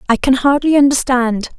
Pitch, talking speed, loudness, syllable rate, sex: 260 Hz, 150 wpm, -13 LUFS, 5.2 syllables/s, female